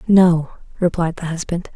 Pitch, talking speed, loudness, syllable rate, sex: 170 Hz, 135 wpm, -19 LUFS, 4.4 syllables/s, female